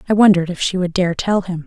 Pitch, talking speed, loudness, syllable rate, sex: 185 Hz, 290 wpm, -17 LUFS, 6.7 syllables/s, female